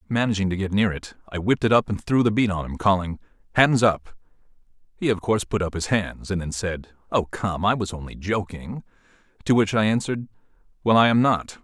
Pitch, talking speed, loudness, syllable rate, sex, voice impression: 100 Hz, 215 wpm, -23 LUFS, 5.8 syllables/s, male, very masculine, very adult-like, middle-aged, thick, tensed, slightly powerful, bright, very soft, clear, very fluent, very cool, very intellectual, slightly refreshing, very sincere, very calm, mature, very friendly, very reassuring, elegant, slightly sweet, very kind